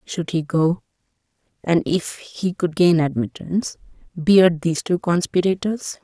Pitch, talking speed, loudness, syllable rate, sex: 170 Hz, 110 wpm, -20 LUFS, 4.3 syllables/s, female